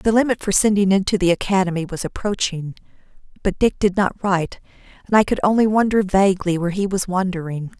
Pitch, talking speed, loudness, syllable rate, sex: 190 Hz, 190 wpm, -19 LUFS, 6.0 syllables/s, female